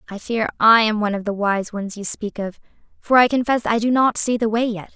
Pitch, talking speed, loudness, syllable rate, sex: 220 Hz, 265 wpm, -19 LUFS, 5.7 syllables/s, female